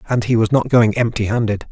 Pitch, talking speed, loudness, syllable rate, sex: 115 Hz, 245 wpm, -16 LUFS, 5.9 syllables/s, male